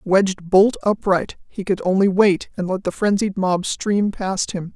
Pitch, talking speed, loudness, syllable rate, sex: 190 Hz, 190 wpm, -19 LUFS, 4.3 syllables/s, female